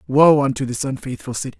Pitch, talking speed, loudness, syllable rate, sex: 130 Hz, 190 wpm, -19 LUFS, 6.3 syllables/s, male